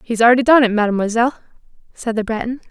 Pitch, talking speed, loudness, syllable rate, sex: 230 Hz, 180 wpm, -16 LUFS, 7.4 syllables/s, female